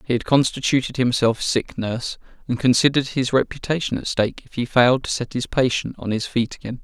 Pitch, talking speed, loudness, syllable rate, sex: 125 Hz, 200 wpm, -21 LUFS, 6.0 syllables/s, male